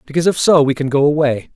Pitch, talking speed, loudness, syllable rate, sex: 145 Hz, 270 wpm, -15 LUFS, 7.2 syllables/s, male